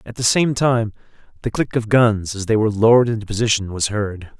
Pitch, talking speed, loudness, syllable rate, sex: 110 Hz, 220 wpm, -18 LUFS, 5.9 syllables/s, male